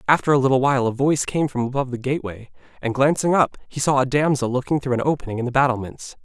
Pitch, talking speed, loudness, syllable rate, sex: 135 Hz, 240 wpm, -21 LUFS, 7.1 syllables/s, male